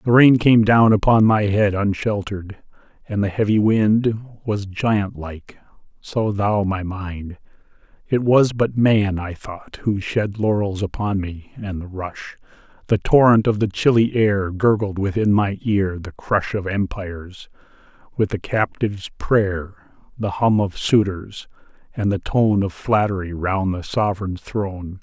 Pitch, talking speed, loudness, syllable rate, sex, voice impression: 100 Hz, 140 wpm, -19 LUFS, 4.2 syllables/s, male, masculine, adult-like, thick, slightly relaxed, powerful, soft, slightly muffled, cool, intellectual, mature, friendly, reassuring, wild, lively, slightly kind, slightly modest